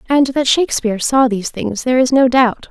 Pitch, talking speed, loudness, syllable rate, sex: 250 Hz, 220 wpm, -14 LUFS, 6.0 syllables/s, female